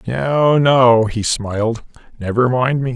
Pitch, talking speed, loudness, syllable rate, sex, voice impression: 120 Hz, 140 wpm, -15 LUFS, 3.6 syllables/s, male, masculine, middle-aged, tensed, powerful, hard, muffled, raspy, mature, slightly friendly, wild, lively, strict, intense, slightly sharp